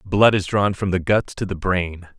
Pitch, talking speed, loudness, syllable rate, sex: 95 Hz, 245 wpm, -20 LUFS, 4.4 syllables/s, male